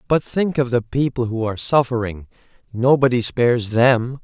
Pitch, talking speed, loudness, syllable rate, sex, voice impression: 125 Hz, 140 wpm, -19 LUFS, 5.0 syllables/s, male, masculine, adult-like, clear, slightly cool, slightly refreshing, sincere, friendly